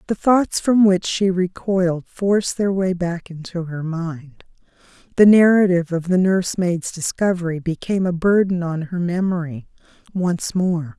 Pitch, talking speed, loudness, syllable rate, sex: 180 Hz, 145 wpm, -19 LUFS, 4.6 syllables/s, female